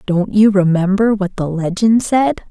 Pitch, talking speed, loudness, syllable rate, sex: 200 Hz, 170 wpm, -14 LUFS, 4.3 syllables/s, female